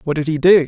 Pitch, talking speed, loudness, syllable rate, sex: 160 Hz, 355 wpm, -15 LUFS, 7.0 syllables/s, male